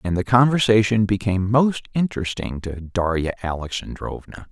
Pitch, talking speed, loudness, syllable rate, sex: 105 Hz, 120 wpm, -21 LUFS, 5.3 syllables/s, male